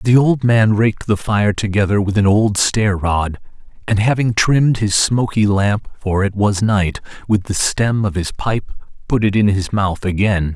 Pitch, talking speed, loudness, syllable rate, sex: 105 Hz, 195 wpm, -16 LUFS, 4.3 syllables/s, male